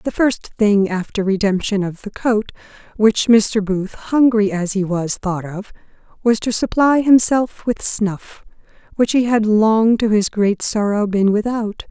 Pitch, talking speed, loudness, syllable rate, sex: 210 Hz, 165 wpm, -17 LUFS, 4.0 syllables/s, female